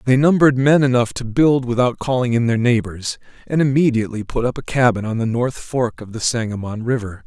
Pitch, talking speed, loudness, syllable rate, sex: 120 Hz, 205 wpm, -18 LUFS, 5.7 syllables/s, male